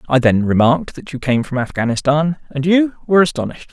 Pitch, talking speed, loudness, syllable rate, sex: 145 Hz, 195 wpm, -16 LUFS, 6.3 syllables/s, male